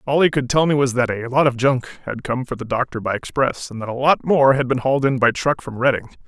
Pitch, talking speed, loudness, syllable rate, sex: 130 Hz, 295 wpm, -19 LUFS, 6.1 syllables/s, male